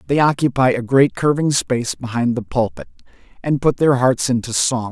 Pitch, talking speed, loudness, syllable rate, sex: 130 Hz, 185 wpm, -17 LUFS, 5.2 syllables/s, male